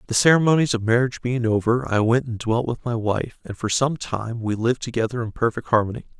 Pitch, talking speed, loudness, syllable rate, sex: 120 Hz, 225 wpm, -22 LUFS, 6.0 syllables/s, male